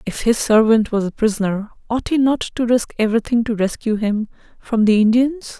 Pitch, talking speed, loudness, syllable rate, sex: 225 Hz, 195 wpm, -18 LUFS, 5.3 syllables/s, female